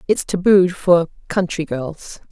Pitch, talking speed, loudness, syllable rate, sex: 175 Hz, 105 wpm, -17 LUFS, 3.7 syllables/s, female